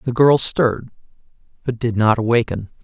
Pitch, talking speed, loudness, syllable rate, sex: 120 Hz, 150 wpm, -18 LUFS, 5.3 syllables/s, male